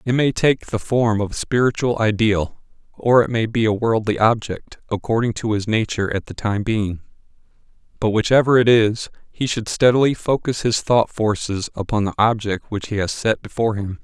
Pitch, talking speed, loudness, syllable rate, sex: 110 Hz, 190 wpm, -19 LUFS, 5.2 syllables/s, male